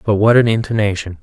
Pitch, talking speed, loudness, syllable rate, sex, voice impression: 105 Hz, 195 wpm, -15 LUFS, 6.2 syllables/s, male, masculine, adult-like, slightly middle-aged, slightly thick, slightly tensed, slightly weak, slightly bright, soft, clear, fluent, slightly raspy, cool, intellectual, slightly refreshing, slightly sincere, calm, friendly, reassuring, elegant, slightly sweet, kind, modest